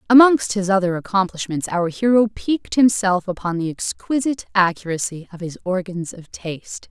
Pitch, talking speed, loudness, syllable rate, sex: 195 Hz, 150 wpm, -20 LUFS, 5.2 syllables/s, female